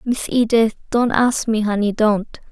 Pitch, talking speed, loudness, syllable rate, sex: 225 Hz, 145 wpm, -18 LUFS, 4.2 syllables/s, female